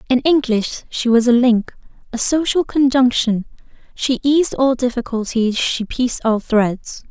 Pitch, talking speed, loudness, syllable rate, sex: 245 Hz, 145 wpm, -17 LUFS, 4.4 syllables/s, female